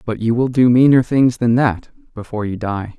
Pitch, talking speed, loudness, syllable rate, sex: 115 Hz, 220 wpm, -15 LUFS, 5.2 syllables/s, male